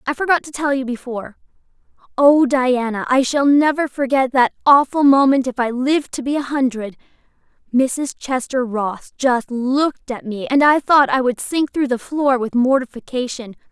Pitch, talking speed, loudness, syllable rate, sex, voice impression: 260 Hz, 175 wpm, -17 LUFS, 4.7 syllables/s, female, slightly gender-neutral, young, fluent, slightly cute, slightly refreshing, friendly